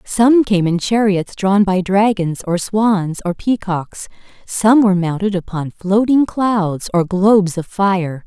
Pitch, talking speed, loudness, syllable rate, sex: 195 Hz, 150 wpm, -16 LUFS, 3.8 syllables/s, female